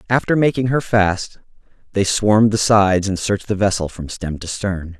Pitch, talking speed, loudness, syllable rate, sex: 100 Hz, 190 wpm, -18 LUFS, 5.2 syllables/s, male